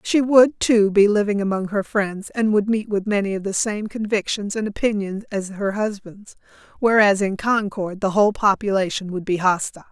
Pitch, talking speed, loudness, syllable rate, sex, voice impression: 205 Hz, 190 wpm, -20 LUFS, 5.1 syllables/s, female, feminine, very adult-like, slightly muffled, slightly calm, slightly elegant